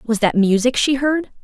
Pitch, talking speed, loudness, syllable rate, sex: 240 Hz, 210 wpm, -17 LUFS, 4.6 syllables/s, female